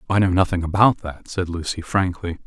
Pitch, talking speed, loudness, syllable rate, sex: 90 Hz, 195 wpm, -21 LUFS, 5.5 syllables/s, male